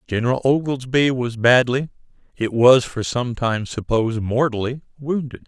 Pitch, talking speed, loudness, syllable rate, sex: 125 Hz, 130 wpm, -19 LUFS, 4.7 syllables/s, male